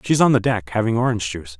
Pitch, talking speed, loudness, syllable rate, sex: 110 Hz, 265 wpm, -19 LUFS, 7.6 syllables/s, male